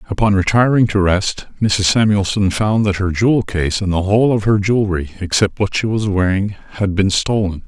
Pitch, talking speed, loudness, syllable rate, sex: 100 Hz, 195 wpm, -16 LUFS, 5.2 syllables/s, male